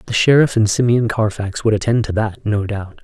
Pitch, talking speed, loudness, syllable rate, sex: 110 Hz, 220 wpm, -17 LUFS, 5.2 syllables/s, male